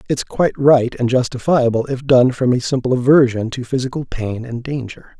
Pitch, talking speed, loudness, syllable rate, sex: 125 Hz, 185 wpm, -17 LUFS, 5.3 syllables/s, male